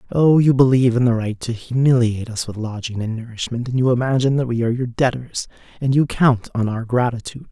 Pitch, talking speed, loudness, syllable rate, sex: 120 Hz, 215 wpm, -19 LUFS, 6.2 syllables/s, male